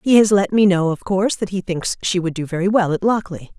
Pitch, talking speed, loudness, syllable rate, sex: 190 Hz, 285 wpm, -18 LUFS, 6.1 syllables/s, female